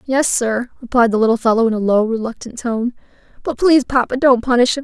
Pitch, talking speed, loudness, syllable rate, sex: 240 Hz, 210 wpm, -16 LUFS, 6.0 syllables/s, female